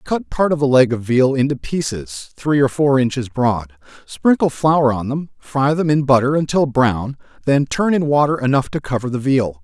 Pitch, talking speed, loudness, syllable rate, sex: 135 Hz, 200 wpm, -17 LUFS, 4.9 syllables/s, male